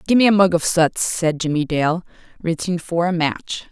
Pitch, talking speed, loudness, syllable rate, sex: 170 Hz, 195 wpm, -19 LUFS, 4.8 syllables/s, female